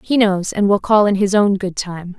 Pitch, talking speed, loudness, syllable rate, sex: 200 Hz, 275 wpm, -16 LUFS, 4.8 syllables/s, female